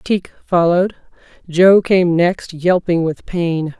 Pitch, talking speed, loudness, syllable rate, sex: 175 Hz, 125 wpm, -15 LUFS, 3.7 syllables/s, female